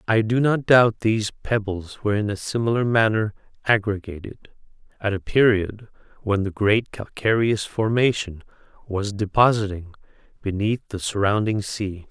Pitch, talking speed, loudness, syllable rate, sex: 105 Hz, 130 wpm, -22 LUFS, 4.7 syllables/s, male